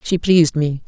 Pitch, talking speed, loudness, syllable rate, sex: 160 Hz, 205 wpm, -16 LUFS, 5.3 syllables/s, female